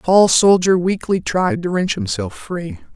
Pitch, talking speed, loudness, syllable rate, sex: 155 Hz, 185 wpm, -17 LUFS, 4.3 syllables/s, male